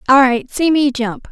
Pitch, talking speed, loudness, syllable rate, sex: 265 Hz, 230 wpm, -15 LUFS, 4.4 syllables/s, female